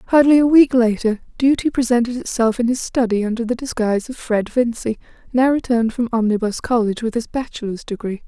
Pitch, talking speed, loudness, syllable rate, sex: 235 Hz, 180 wpm, -18 LUFS, 6.0 syllables/s, female